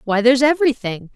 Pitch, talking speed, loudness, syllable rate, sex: 245 Hz, 155 wpm, -16 LUFS, 6.9 syllables/s, female